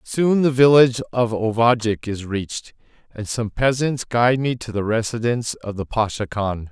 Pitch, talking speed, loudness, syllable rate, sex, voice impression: 115 Hz, 170 wpm, -20 LUFS, 4.9 syllables/s, male, masculine, adult-like, tensed, powerful, clear, fluent, cool, intellectual, calm, friendly, reassuring, wild, lively, slightly strict